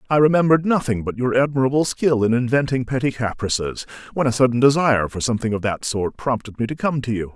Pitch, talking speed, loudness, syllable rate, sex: 125 Hz, 210 wpm, -20 LUFS, 6.4 syllables/s, male